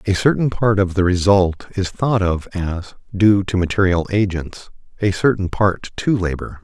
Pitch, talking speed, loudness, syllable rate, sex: 95 Hz, 170 wpm, -18 LUFS, 4.5 syllables/s, male